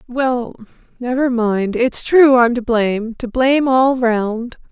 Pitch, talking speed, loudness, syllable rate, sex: 245 Hz, 155 wpm, -15 LUFS, 3.8 syllables/s, female